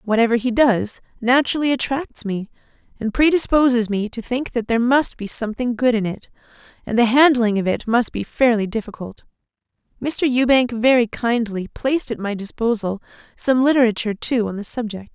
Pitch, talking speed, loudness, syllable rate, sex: 235 Hz, 165 wpm, -19 LUFS, 5.4 syllables/s, female